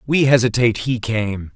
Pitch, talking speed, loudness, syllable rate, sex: 120 Hz, 155 wpm, -18 LUFS, 5.0 syllables/s, male